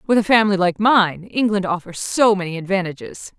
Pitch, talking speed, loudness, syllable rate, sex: 195 Hz, 175 wpm, -18 LUFS, 5.5 syllables/s, female